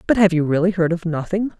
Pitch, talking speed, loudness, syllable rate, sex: 180 Hz, 265 wpm, -19 LUFS, 6.3 syllables/s, female